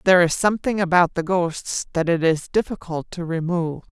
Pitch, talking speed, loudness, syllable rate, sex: 175 Hz, 180 wpm, -21 LUFS, 5.5 syllables/s, female